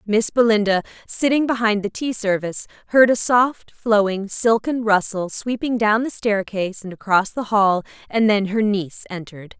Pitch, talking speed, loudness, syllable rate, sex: 210 Hz, 165 wpm, -19 LUFS, 4.9 syllables/s, female